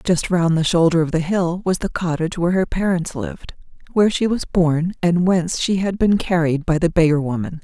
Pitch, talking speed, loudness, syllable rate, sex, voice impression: 175 Hz, 220 wpm, -19 LUFS, 5.5 syllables/s, female, feminine, adult-like, slightly fluent, slightly intellectual, calm